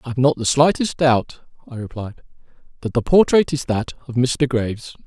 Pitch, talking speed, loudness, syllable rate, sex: 130 Hz, 190 wpm, -19 LUFS, 5.3 syllables/s, male